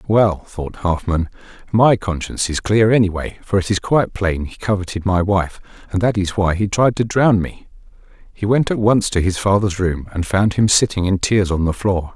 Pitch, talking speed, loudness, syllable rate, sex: 100 Hz, 210 wpm, -18 LUFS, 5.0 syllables/s, male